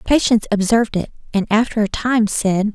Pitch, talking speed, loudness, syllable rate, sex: 215 Hz, 175 wpm, -17 LUFS, 5.5 syllables/s, female